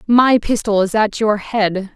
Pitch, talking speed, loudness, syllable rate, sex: 215 Hz, 185 wpm, -16 LUFS, 3.9 syllables/s, female